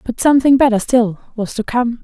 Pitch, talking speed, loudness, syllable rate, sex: 240 Hz, 205 wpm, -15 LUFS, 5.5 syllables/s, female